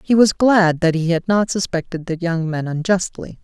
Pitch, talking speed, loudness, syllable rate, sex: 175 Hz, 210 wpm, -18 LUFS, 4.8 syllables/s, female